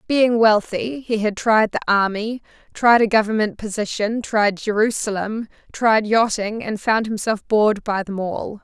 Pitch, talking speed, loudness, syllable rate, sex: 215 Hz, 155 wpm, -19 LUFS, 4.3 syllables/s, female